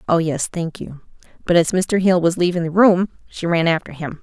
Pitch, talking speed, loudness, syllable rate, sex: 170 Hz, 215 wpm, -18 LUFS, 5.2 syllables/s, female